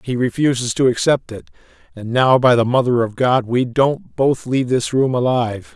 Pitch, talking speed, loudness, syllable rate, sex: 125 Hz, 200 wpm, -17 LUFS, 5.1 syllables/s, male